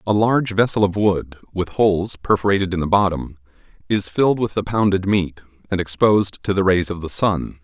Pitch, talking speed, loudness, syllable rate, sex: 95 Hz, 195 wpm, -19 LUFS, 5.7 syllables/s, male